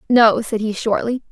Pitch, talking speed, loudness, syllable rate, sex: 225 Hz, 185 wpm, -17 LUFS, 4.7 syllables/s, female